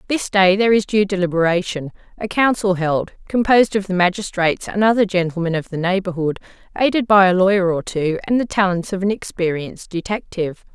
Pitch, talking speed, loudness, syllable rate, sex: 190 Hz, 180 wpm, -18 LUFS, 5.9 syllables/s, female